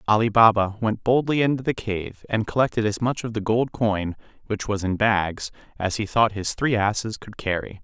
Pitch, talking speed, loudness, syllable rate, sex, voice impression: 110 Hz, 205 wpm, -23 LUFS, 5.0 syllables/s, male, masculine, adult-like, slightly thick, tensed, powerful, bright, soft, cool, slightly refreshing, friendly, wild, lively, kind, light